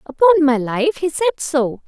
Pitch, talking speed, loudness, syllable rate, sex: 300 Hz, 190 wpm, -17 LUFS, 5.0 syllables/s, female